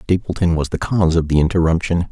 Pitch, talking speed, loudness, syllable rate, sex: 85 Hz, 200 wpm, -17 LUFS, 6.6 syllables/s, male